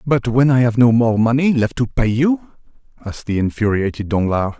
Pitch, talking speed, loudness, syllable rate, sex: 120 Hz, 195 wpm, -16 LUFS, 5.3 syllables/s, male